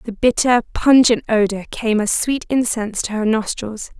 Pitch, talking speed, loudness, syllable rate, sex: 225 Hz, 165 wpm, -17 LUFS, 4.8 syllables/s, female